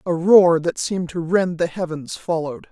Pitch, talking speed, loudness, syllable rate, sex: 170 Hz, 200 wpm, -19 LUFS, 5.0 syllables/s, female